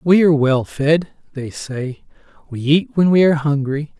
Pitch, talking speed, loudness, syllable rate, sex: 150 Hz, 180 wpm, -17 LUFS, 4.6 syllables/s, male